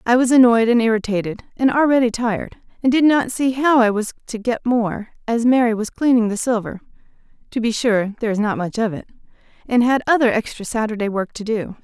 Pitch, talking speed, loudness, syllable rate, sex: 230 Hz, 210 wpm, -18 LUFS, 5.1 syllables/s, female